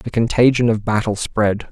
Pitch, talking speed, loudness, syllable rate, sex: 110 Hz, 175 wpm, -17 LUFS, 4.8 syllables/s, male